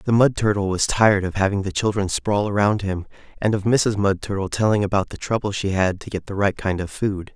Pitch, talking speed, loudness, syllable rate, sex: 100 Hz, 245 wpm, -21 LUFS, 5.6 syllables/s, male